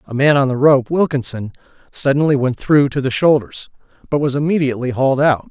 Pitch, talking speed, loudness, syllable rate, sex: 135 Hz, 185 wpm, -16 LUFS, 6.0 syllables/s, male